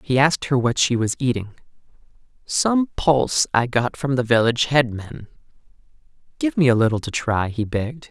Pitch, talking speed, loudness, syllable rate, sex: 125 Hz, 170 wpm, -20 LUFS, 5.2 syllables/s, male